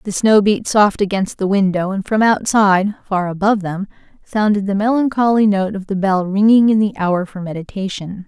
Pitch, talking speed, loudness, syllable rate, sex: 200 Hz, 190 wpm, -16 LUFS, 5.2 syllables/s, female